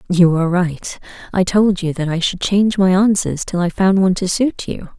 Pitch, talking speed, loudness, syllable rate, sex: 185 Hz, 230 wpm, -16 LUFS, 5.2 syllables/s, female